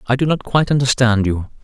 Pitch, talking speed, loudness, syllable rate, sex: 125 Hz, 220 wpm, -16 LUFS, 6.3 syllables/s, male